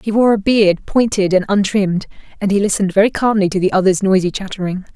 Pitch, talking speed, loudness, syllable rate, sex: 195 Hz, 205 wpm, -15 LUFS, 6.4 syllables/s, female